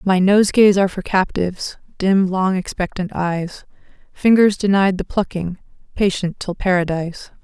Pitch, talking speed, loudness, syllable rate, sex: 190 Hz, 130 wpm, -18 LUFS, 4.8 syllables/s, female